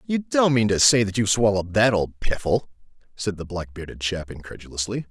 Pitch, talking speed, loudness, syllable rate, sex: 105 Hz, 200 wpm, -22 LUFS, 5.8 syllables/s, male